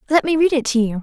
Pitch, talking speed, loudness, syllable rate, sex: 270 Hz, 350 wpm, -17 LUFS, 7.2 syllables/s, female